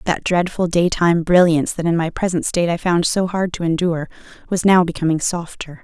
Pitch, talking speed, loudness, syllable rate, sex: 170 Hz, 195 wpm, -18 LUFS, 5.9 syllables/s, female